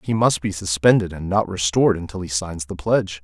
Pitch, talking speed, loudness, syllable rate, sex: 90 Hz, 225 wpm, -20 LUFS, 5.8 syllables/s, male